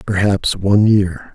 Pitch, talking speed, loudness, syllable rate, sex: 100 Hz, 135 wpm, -15 LUFS, 4.1 syllables/s, male